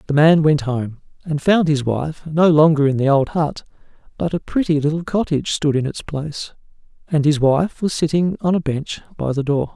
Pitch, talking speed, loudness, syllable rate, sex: 155 Hz, 210 wpm, -18 LUFS, 5.1 syllables/s, male